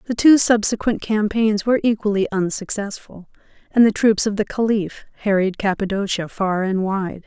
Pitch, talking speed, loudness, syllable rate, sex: 205 Hz, 150 wpm, -19 LUFS, 5.0 syllables/s, female